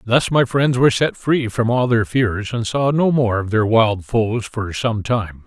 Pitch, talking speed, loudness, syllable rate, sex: 115 Hz, 230 wpm, -18 LUFS, 4.1 syllables/s, male